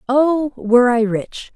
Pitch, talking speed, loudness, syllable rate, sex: 255 Hz, 155 wpm, -16 LUFS, 3.8 syllables/s, female